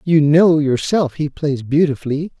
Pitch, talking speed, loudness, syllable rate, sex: 150 Hz, 150 wpm, -16 LUFS, 4.4 syllables/s, male